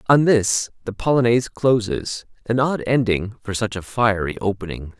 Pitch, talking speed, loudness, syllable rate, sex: 110 Hz, 155 wpm, -20 LUFS, 4.9 syllables/s, male